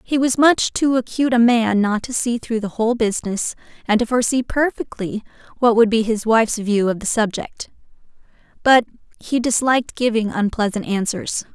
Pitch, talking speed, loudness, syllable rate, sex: 230 Hz, 170 wpm, -18 LUFS, 5.3 syllables/s, female